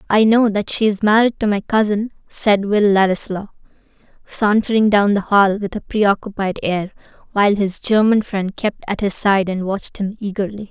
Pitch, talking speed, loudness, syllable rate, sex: 205 Hz, 180 wpm, -17 LUFS, 5.0 syllables/s, female